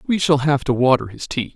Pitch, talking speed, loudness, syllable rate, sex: 135 Hz, 270 wpm, -18 LUFS, 5.5 syllables/s, male